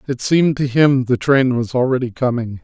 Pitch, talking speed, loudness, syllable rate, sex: 130 Hz, 205 wpm, -16 LUFS, 5.3 syllables/s, male